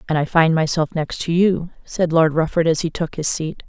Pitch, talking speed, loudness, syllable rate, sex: 160 Hz, 245 wpm, -19 LUFS, 5.1 syllables/s, female